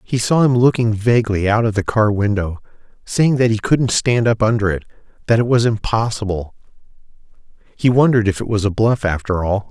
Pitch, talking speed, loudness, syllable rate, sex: 110 Hz, 180 wpm, -17 LUFS, 5.5 syllables/s, male